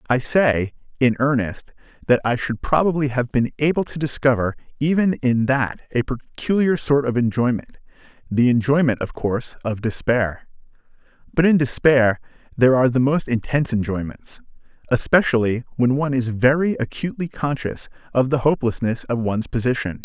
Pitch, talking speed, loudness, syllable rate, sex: 130 Hz, 145 wpm, -20 LUFS, 5.3 syllables/s, male